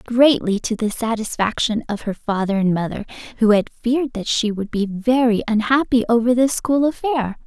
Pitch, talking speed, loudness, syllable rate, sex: 230 Hz, 175 wpm, -19 LUFS, 5.0 syllables/s, female